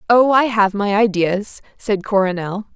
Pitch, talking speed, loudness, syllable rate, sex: 205 Hz, 155 wpm, -17 LUFS, 4.3 syllables/s, female